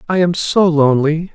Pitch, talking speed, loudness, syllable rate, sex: 165 Hz, 180 wpm, -14 LUFS, 5.1 syllables/s, male